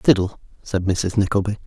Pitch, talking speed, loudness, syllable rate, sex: 100 Hz, 145 wpm, -21 LUFS, 5.2 syllables/s, male